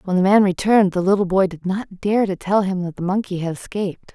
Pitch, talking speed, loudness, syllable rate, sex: 190 Hz, 260 wpm, -19 LUFS, 6.0 syllables/s, female